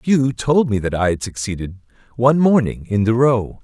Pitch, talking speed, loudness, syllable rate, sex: 115 Hz, 200 wpm, -17 LUFS, 5.1 syllables/s, male